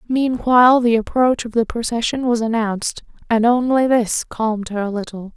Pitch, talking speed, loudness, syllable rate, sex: 230 Hz, 170 wpm, -18 LUFS, 5.1 syllables/s, female